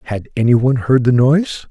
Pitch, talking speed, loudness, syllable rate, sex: 125 Hz, 210 wpm, -14 LUFS, 6.0 syllables/s, male